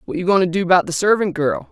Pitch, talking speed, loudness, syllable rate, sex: 180 Hz, 315 wpm, -17 LUFS, 6.9 syllables/s, male